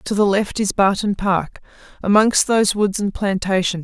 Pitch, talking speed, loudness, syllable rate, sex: 200 Hz, 170 wpm, -18 LUFS, 4.8 syllables/s, female